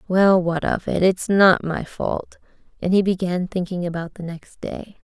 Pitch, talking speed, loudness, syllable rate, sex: 185 Hz, 190 wpm, -21 LUFS, 4.3 syllables/s, female